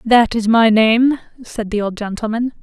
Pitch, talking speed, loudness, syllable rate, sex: 225 Hz, 185 wpm, -15 LUFS, 4.4 syllables/s, female